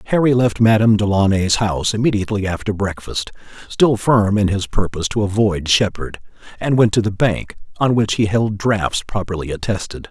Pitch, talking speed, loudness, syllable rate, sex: 105 Hz, 165 wpm, -17 LUFS, 5.4 syllables/s, male